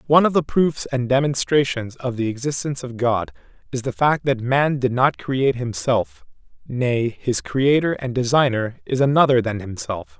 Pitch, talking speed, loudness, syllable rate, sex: 130 Hz, 170 wpm, -20 LUFS, 4.8 syllables/s, male